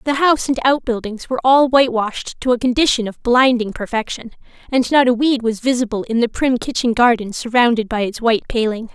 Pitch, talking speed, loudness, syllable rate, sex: 240 Hz, 200 wpm, -17 LUFS, 6.0 syllables/s, female